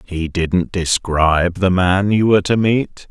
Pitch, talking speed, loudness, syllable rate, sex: 90 Hz, 175 wpm, -16 LUFS, 4.0 syllables/s, male